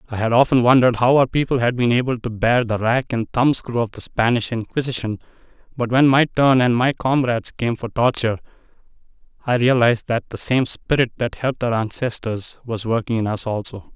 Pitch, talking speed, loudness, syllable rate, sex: 120 Hz, 195 wpm, -19 LUFS, 5.6 syllables/s, male